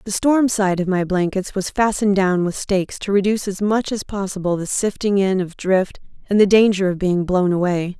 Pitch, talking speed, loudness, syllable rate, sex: 195 Hz, 220 wpm, -19 LUFS, 5.3 syllables/s, female